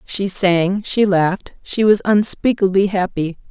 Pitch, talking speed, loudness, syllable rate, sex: 195 Hz, 135 wpm, -16 LUFS, 4.1 syllables/s, female